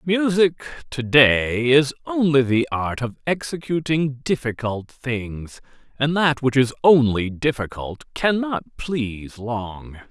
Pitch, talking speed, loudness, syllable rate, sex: 135 Hz, 120 wpm, -20 LUFS, 3.7 syllables/s, male